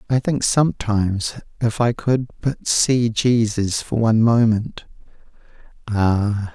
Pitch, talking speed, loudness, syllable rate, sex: 115 Hz, 110 wpm, -19 LUFS, 4.2 syllables/s, male